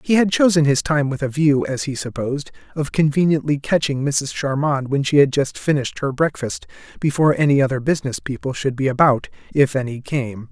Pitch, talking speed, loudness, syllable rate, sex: 140 Hz, 195 wpm, -19 LUFS, 5.6 syllables/s, male